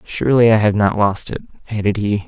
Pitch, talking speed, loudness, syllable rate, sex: 105 Hz, 210 wpm, -16 LUFS, 6.0 syllables/s, male